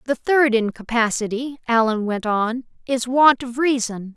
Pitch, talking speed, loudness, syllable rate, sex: 240 Hz, 145 wpm, -20 LUFS, 4.3 syllables/s, female